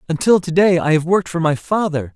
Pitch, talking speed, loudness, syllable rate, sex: 165 Hz, 225 wpm, -16 LUFS, 6.1 syllables/s, male